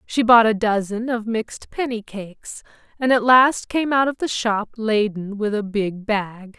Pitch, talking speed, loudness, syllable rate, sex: 220 Hz, 190 wpm, -20 LUFS, 4.3 syllables/s, female